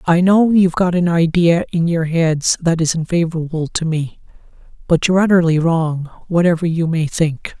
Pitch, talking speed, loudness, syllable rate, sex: 165 Hz, 175 wpm, -16 LUFS, 4.9 syllables/s, male